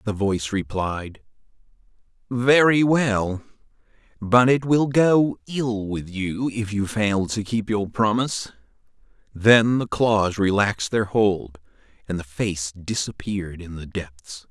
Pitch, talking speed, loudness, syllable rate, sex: 105 Hz, 130 wpm, -22 LUFS, 3.8 syllables/s, male